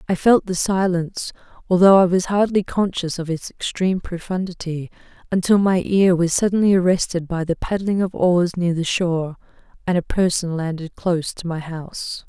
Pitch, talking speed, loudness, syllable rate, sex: 180 Hz, 170 wpm, -20 LUFS, 5.2 syllables/s, female